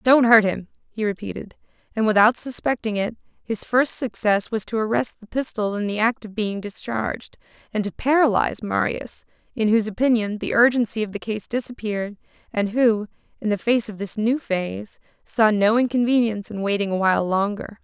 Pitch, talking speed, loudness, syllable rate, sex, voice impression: 215 Hz, 180 wpm, -22 LUFS, 5.4 syllables/s, female, feminine, adult-like, slightly clear, intellectual, slightly calm